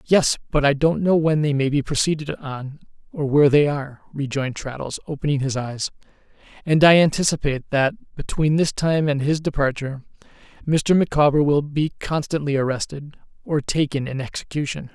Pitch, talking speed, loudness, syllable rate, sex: 145 Hz, 160 wpm, -21 LUFS, 5.3 syllables/s, male